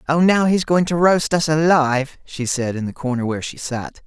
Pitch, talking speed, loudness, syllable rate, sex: 150 Hz, 235 wpm, -18 LUFS, 5.2 syllables/s, male